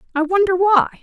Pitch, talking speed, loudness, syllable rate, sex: 375 Hz, 175 wpm, -16 LUFS, 5.5 syllables/s, female